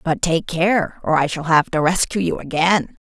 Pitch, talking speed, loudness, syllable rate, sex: 170 Hz, 215 wpm, -18 LUFS, 4.6 syllables/s, female